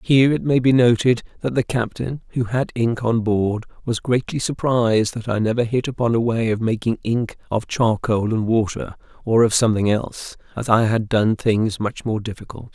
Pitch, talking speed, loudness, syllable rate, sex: 115 Hz, 200 wpm, -20 LUFS, 5.1 syllables/s, male